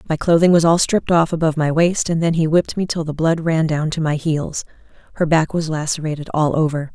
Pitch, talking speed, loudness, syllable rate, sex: 160 Hz, 240 wpm, -18 LUFS, 6.0 syllables/s, female